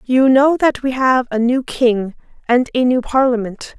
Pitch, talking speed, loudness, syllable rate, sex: 250 Hz, 190 wpm, -15 LUFS, 4.2 syllables/s, female